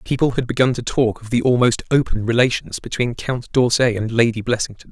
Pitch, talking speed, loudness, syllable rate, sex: 120 Hz, 195 wpm, -19 LUFS, 5.7 syllables/s, male